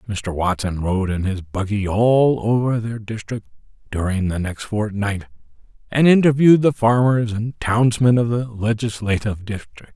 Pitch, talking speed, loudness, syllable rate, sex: 110 Hz, 145 wpm, -19 LUFS, 4.6 syllables/s, male